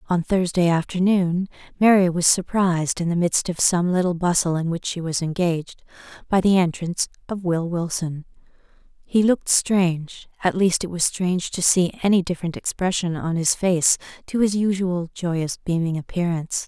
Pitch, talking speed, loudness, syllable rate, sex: 175 Hz, 165 wpm, -21 LUFS, 5.1 syllables/s, female